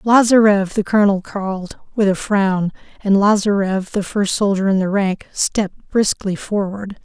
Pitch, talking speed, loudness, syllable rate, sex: 200 Hz, 155 wpm, -17 LUFS, 4.5 syllables/s, female